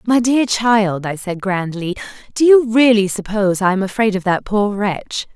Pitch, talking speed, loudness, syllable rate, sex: 205 Hz, 190 wpm, -16 LUFS, 4.6 syllables/s, female